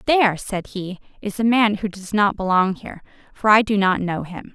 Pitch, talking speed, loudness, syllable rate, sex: 200 Hz, 225 wpm, -20 LUFS, 5.2 syllables/s, female